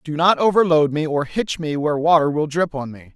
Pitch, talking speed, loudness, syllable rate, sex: 155 Hz, 245 wpm, -18 LUFS, 5.6 syllables/s, male